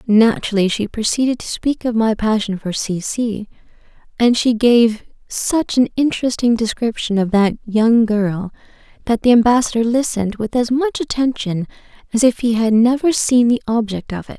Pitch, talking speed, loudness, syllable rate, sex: 230 Hz, 165 wpm, -17 LUFS, 5.0 syllables/s, female